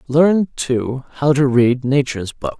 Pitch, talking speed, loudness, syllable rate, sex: 135 Hz, 160 wpm, -17 LUFS, 4.1 syllables/s, male